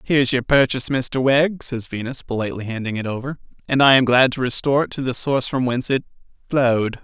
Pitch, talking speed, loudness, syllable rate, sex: 130 Hz, 215 wpm, -19 LUFS, 6.5 syllables/s, male